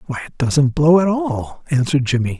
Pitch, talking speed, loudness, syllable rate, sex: 140 Hz, 200 wpm, -17 LUFS, 5.2 syllables/s, male